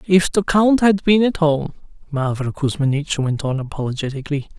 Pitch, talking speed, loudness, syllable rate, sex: 155 Hz, 155 wpm, -19 LUFS, 5.5 syllables/s, male